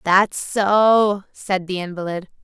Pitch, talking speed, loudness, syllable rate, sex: 195 Hz, 125 wpm, -19 LUFS, 3.3 syllables/s, female